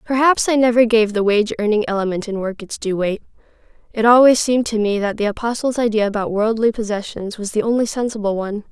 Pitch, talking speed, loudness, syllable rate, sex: 220 Hz, 205 wpm, -18 LUFS, 6.2 syllables/s, female